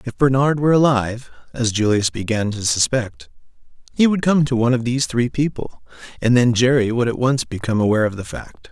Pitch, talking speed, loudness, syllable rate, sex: 120 Hz, 185 wpm, -18 LUFS, 6.0 syllables/s, male